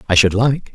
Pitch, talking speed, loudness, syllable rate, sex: 115 Hz, 240 wpm, -15 LUFS, 5.5 syllables/s, male